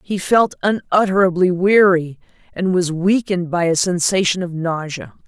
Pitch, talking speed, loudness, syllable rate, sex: 180 Hz, 135 wpm, -17 LUFS, 4.7 syllables/s, female